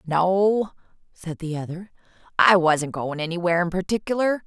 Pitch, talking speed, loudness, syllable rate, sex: 180 Hz, 135 wpm, -22 LUFS, 4.9 syllables/s, female